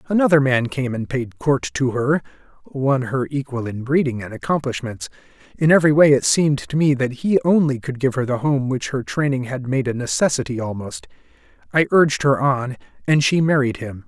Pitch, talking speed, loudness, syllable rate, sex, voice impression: 135 Hz, 190 wpm, -19 LUFS, 5.4 syllables/s, male, masculine, slightly old, slightly raspy, slightly refreshing, sincere, kind